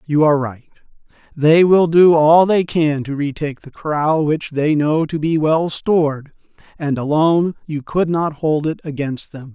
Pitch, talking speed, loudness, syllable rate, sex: 155 Hz, 180 wpm, -16 LUFS, 4.5 syllables/s, male